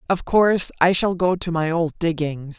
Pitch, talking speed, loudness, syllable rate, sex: 170 Hz, 210 wpm, -20 LUFS, 4.8 syllables/s, female